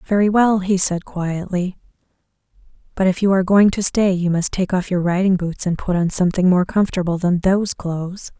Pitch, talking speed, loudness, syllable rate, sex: 185 Hz, 200 wpm, -18 LUFS, 5.5 syllables/s, female